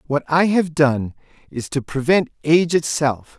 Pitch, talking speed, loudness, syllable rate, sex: 150 Hz, 160 wpm, -19 LUFS, 4.4 syllables/s, male